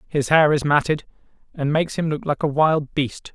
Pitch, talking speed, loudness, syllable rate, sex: 150 Hz, 215 wpm, -20 LUFS, 5.1 syllables/s, male